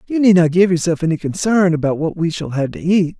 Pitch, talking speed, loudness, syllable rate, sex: 170 Hz, 265 wpm, -16 LUFS, 5.9 syllables/s, male